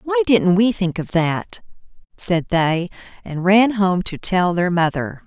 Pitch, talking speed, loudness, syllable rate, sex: 190 Hz, 170 wpm, -18 LUFS, 3.8 syllables/s, female